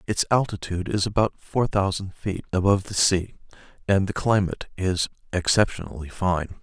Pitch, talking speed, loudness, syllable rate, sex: 95 Hz, 145 wpm, -24 LUFS, 5.3 syllables/s, male